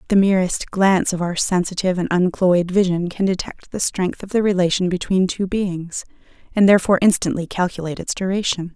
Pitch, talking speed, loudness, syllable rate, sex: 185 Hz, 170 wpm, -19 LUFS, 5.7 syllables/s, female